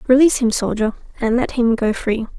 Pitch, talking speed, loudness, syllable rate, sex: 235 Hz, 200 wpm, -18 LUFS, 5.7 syllables/s, female